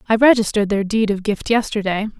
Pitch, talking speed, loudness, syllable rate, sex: 210 Hz, 190 wpm, -18 LUFS, 6.1 syllables/s, female